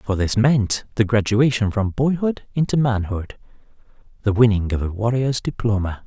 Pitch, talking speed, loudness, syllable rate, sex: 110 Hz, 150 wpm, -20 LUFS, 4.8 syllables/s, male